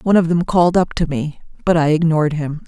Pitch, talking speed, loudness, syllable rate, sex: 165 Hz, 245 wpm, -17 LUFS, 6.3 syllables/s, female